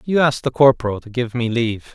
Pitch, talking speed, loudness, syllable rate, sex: 125 Hz, 245 wpm, -18 LUFS, 5.8 syllables/s, male